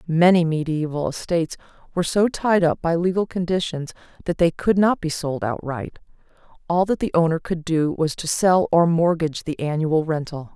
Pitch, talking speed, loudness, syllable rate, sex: 165 Hz, 175 wpm, -21 LUFS, 5.2 syllables/s, female